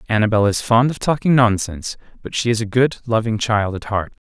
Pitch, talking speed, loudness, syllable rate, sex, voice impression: 110 Hz, 210 wpm, -18 LUFS, 5.7 syllables/s, male, masculine, adult-like, fluent, refreshing, sincere, slightly friendly